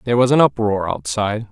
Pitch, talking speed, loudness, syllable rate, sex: 115 Hz, 195 wpm, -17 LUFS, 6.5 syllables/s, male